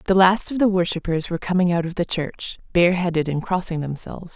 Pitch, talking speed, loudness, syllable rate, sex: 175 Hz, 205 wpm, -21 LUFS, 6.0 syllables/s, female